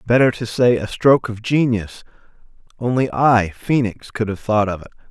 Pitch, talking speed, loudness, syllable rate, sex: 115 Hz, 175 wpm, -18 LUFS, 5.0 syllables/s, male